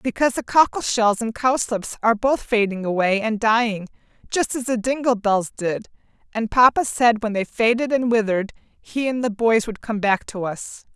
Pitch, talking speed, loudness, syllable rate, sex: 225 Hz, 190 wpm, -20 LUFS, 5.0 syllables/s, female